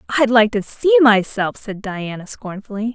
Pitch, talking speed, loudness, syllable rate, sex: 220 Hz, 165 wpm, -17 LUFS, 4.7 syllables/s, female